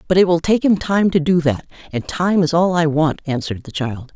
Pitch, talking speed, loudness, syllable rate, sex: 165 Hz, 260 wpm, -17 LUFS, 5.4 syllables/s, female